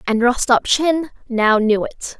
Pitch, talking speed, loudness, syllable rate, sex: 245 Hz, 135 wpm, -17 LUFS, 3.8 syllables/s, female